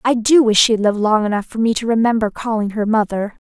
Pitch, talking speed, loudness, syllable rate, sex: 220 Hz, 240 wpm, -16 LUFS, 6.1 syllables/s, female